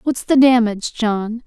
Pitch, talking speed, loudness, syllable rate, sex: 230 Hz, 165 wpm, -16 LUFS, 4.4 syllables/s, female